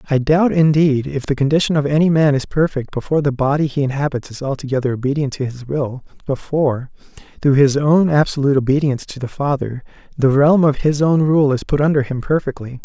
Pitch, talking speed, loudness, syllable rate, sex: 140 Hz, 190 wpm, -17 LUFS, 5.9 syllables/s, male